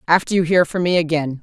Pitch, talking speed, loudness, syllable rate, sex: 165 Hz, 250 wpm, -17 LUFS, 6.3 syllables/s, female